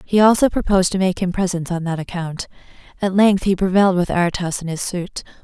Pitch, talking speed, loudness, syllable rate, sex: 185 Hz, 210 wpm, -18 LUFS, 6.0 syllables/s, female